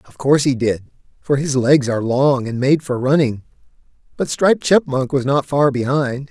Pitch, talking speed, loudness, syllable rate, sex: 135 Hz, 190 wpm, -17 LUFS, 5.0 syllables/s, male